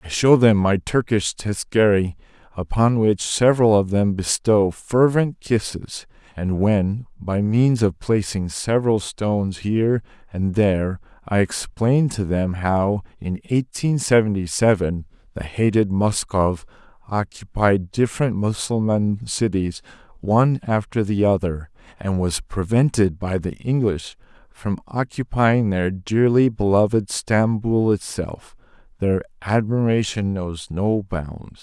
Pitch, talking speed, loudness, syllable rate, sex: 105 Hz, 120 wpm, -20 LUFS, 4.0 syllables/s, male